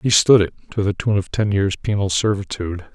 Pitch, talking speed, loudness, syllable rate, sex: 100 Hz, 205 wpm, -19 LUFS, 5.5 syllables/s, male